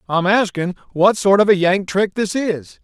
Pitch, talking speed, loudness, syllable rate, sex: 190 Hz, 210 wpm, -17 LUFS, 4.5 syllables/s, male